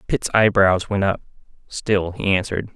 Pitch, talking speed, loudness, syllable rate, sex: 95 Hz, 150 wpm, -19 LUFS, 4.9 syllables/s, male